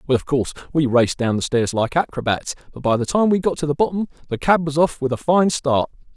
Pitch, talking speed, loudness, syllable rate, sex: 145 Hz, 265 wpm, -20 LUFS, 6.2 syllables/s, male